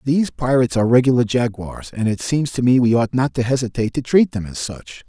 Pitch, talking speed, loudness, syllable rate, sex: 120 Hz, 235 wpm, -18 LUFS, 6.0 syllables/s, male